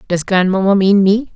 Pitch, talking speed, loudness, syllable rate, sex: 195 Hz, 180 wpm, -13 LUFS, 5.0 syllables/s, male